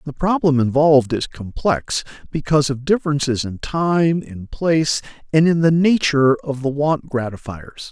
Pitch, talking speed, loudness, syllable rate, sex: 145 Hz, 150 wpm, -18 LUFS, 4.7 syllables/s, male